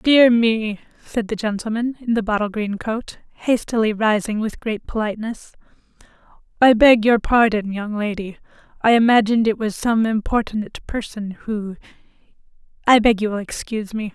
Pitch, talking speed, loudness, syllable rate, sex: 220 Hz, 140 wpm, -19 LUFS, 5.1 syllables/s, female